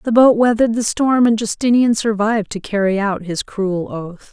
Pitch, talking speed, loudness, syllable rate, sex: 215 Hz, 195 wpm, -16 LUFS, 5.0 syllables/s, female